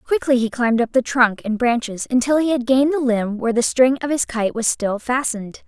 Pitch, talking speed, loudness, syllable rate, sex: 245 Hz, 245 wpm, -19 LUFS, 5.8 syllables/s, female